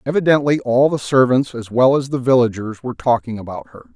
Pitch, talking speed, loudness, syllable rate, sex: 125 Hz, 195 wpm, -17 LUFS, 5.8 syllables/s, male